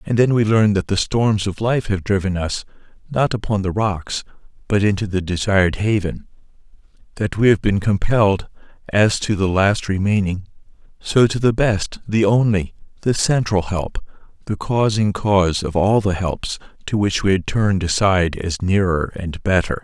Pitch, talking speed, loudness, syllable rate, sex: 100 Hz, 170 wpm, -19 LUFS, 4.8 syllables/s, male